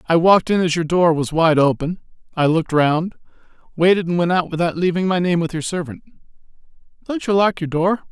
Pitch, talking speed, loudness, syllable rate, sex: 170 Hz, 205 wpm, -18 LUFS, 5.9 syllables/s, male